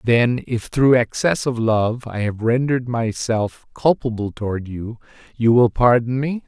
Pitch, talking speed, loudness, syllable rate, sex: 120 Hz, 160 wpm, -19 LUFS, 4.2 syllables/s, male